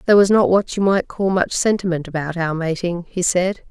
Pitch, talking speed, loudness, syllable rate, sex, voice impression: 180 Hz, 225 wpm, -18 LUFS, 5.4 syllables/s, female, feminine, adult-like, tensed, powerful, slightly hard, clear, intellectual, calm, slightly friendly, elegant, slightly sharp